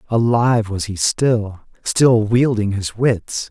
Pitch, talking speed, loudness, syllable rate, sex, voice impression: 110 Hz, 135 wpm, -17 LUFS, 3.6 syllables/s, male, very masculine, slightly adult-like, thick, relaxed, weak, dark, very soft, muffled, slightly fluent, cool, very intellectual, slightly refreshing, very sincere, very calm, slightly mature, very friendly, very reassuring, unique, elegant, slightly wild, sweet, slightly lively, kind, modest